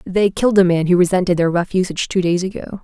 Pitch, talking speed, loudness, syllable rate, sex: 185 Hz, 255 wpm, -16 LUFS, 6.6 syllables/s, female